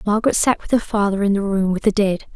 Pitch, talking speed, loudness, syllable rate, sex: 205 Hz, 280 wpm, -19 LUFS, 6.4 syllables/s, female